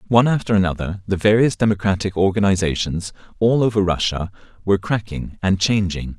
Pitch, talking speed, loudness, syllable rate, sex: 100 Hz, 135 wpm, -19 LUFS, 5.8 syllables/s, male